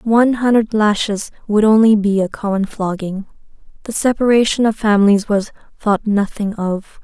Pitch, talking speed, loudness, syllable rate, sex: 210 Hz, 145 wpm, -16 LUFS, 4.9 syllables/s, female